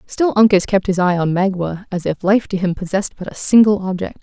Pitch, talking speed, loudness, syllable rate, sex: 190 Hz, 240 wpm, -16 LUFS, 5.7 syllables/s, female